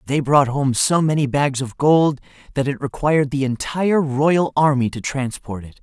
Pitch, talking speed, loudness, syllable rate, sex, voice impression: 140 Hz, 185 wpm, -19 LUFS, 4.8 syllables/s, male, very masculine, slightly young, slightly thick, slightly relaxed, powerful, bright, slightly hard, very clear, fluent, cool, slightly intellectual, very refreshing, sincere, calm, mature, very friendly, very reassuring, unique, elegant, slightly wild, sweet, lively, kind, slightly modest, slightly light